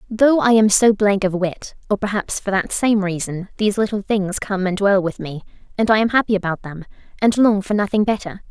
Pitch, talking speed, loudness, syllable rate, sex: 200 Hz, 225 wpm, -18 LUFS, 5.4 syllables/s, female